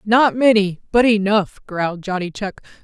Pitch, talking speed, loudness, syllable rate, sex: 205 Hz, 150 wpm, -18 LUFS, 4.7 syllables/s, female